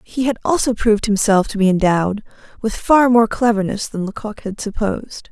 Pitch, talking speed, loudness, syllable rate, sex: 215 Hz, 180 wpm, -17 LUFS, 5.4 syllables/s, female